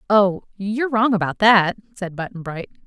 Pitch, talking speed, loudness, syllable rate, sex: 200 Hz, 170 wpm, -19 LUFS, 4.8 syllables/s, female